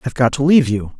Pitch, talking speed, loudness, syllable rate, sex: 130 Hz, 300 wpm, -15 LUFS, 8.4 syllables/s, male